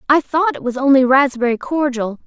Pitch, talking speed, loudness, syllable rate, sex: 270 Hz, 185 wpm, -16 LUFS, 5.4 syllables/s, female